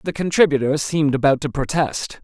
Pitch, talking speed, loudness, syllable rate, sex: 145 Hz, 160 wpm, -19 LUFS, 5.7 syllables/s, male